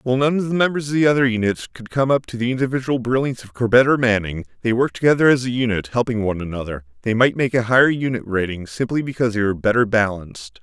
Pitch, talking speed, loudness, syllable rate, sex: 120 Hz, 235 wpm, -19 LUFS, 7.0 syllables/s, male